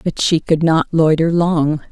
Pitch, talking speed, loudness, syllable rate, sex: 160 Hz, 190 wpm, -15 LUFS, 4.1 syllables/s, female